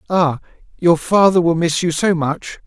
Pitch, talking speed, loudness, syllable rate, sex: 170 Hz, 155 wpm, -16 LUFS, 4.6 syllables/s, male